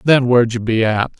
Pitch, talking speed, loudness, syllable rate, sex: 120 Hz, 250 wpm, -15 LUFS, 5.7 syllables/s, male